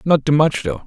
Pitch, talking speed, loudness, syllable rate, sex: 145 Hz, 280 wpm, -17 LUFS, 5.2 syllables/s, male